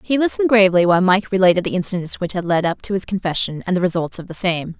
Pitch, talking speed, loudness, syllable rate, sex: 185 Hz, 265 wpm, -18 LUFS, 7.0 syllables/s, female